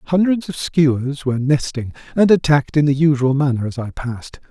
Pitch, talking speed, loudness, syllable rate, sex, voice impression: 140 Hz, 185 wpm, -18 LUFS, 5.6 syllables/s, male, very masculine, old, very thick, slightly relaxed, powerful, bright, very soft, very muffled, fluent, raspy, cool, very intellectual, slightly refreshing, very sincere, very calm, very mature, very friendly, very reassuring, very unique, very elegant, wild, sweet, lively, very kind, slightly modest